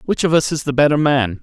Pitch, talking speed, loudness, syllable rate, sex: 145 Hz, 295 wpm, -16 LUFS, 6.2 syllables/s, male